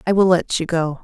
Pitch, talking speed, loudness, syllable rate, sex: 175 Hz, 290 wpm, -18 LUFS, 5.7 syllables/s, female